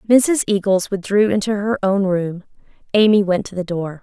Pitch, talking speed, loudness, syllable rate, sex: 200 Hz, 180 wpm, -18 LUFS, 4.9 syllables/s, female